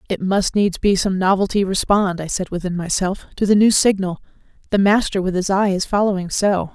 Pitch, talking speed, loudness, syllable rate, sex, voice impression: 195 Hz, 205 wpm, -18 LUFS, 5.3 syllables/s, female, feminine, adult-like, slightly muffled, slightly intellectual, calm